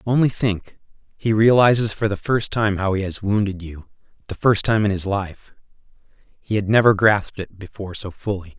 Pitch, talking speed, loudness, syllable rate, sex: 100 Hz, 190 wpm, -19 LUFS, 5.2 syllables/s, male